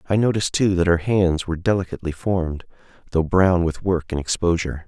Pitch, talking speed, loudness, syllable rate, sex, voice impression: 90 Hz, 185 wpm, -21 LUFS, 6.2 syllables/s, male, masculine, adult-like, slightly thick, cool, slightly intellectual, calm, slightly sweet